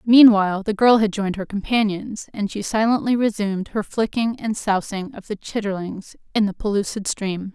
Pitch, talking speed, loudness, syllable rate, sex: 205 Hz, 175 wpm, -21 LUFS, 5.1 syllables/s, female